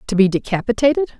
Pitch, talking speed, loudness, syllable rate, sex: 220 Hz, 150 wpm, -17 LUFS, 7.2 syllables/s, female